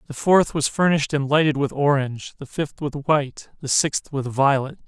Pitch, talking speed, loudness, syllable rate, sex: 145 Hz, 170 wpm, -21 LUFS, 5.2 syllables/s, male